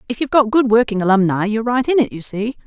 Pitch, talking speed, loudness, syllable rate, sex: 230 Hz, 270 wpm, -16 LUFS, 7.0 syllables/s, female